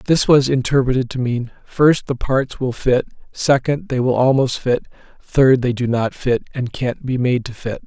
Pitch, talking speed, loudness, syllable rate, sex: 130 Hz, 200 wpm, -18 LUFS, 4.5 syllables/s, male